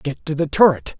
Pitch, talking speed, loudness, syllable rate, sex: 150 Hz, 240 wpm, -17 LUFS, 5.3 syllables/s, male